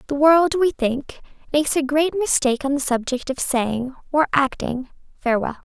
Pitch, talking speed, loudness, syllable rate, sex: 275 Hz, 170 wpm, -20 LUFS, 4.9 syllables/s, female